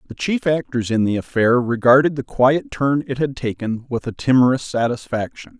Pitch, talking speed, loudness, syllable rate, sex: 125 Hz, 180 wpm, -19 LUFS, 5.0 syllables/s, male